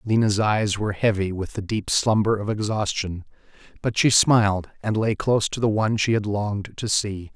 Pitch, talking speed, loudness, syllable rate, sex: 105 Hz, 195 wpm, -22 LUFS, 5.2 syllables/s, male